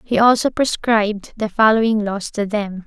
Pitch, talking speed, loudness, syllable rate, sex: 215 Hz, 170 wpm, -18 LUFS, 4.7 syllables/s, female